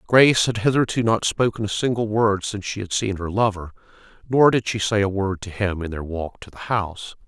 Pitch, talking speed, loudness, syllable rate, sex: 105 Hz, 230 wpm, -21 LUFS, 5.6 syllables/s, male